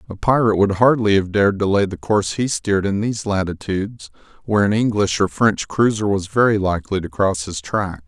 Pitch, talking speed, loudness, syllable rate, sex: 100 Hz, 210 wpm, -18 LUFS, 5.9 syllables/s, male